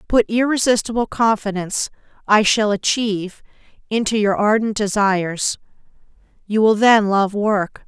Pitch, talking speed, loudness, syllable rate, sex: 210 Hz, 115 wpm, -18 LUFS, 4.7 syllables/s, female